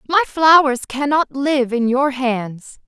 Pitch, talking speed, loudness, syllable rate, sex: 270 Hz, 145 wpm, -16 LUFS, 3.4 syllables/s, female